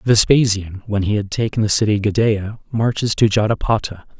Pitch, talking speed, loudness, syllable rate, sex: 105 Hz, 155 wpm, -18 LUFS, 5.2 syllables/s, male